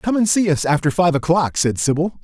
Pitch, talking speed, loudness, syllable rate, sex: 165 Hz, 240 wpm, -17 LUFS, 5.5 syllables/s, male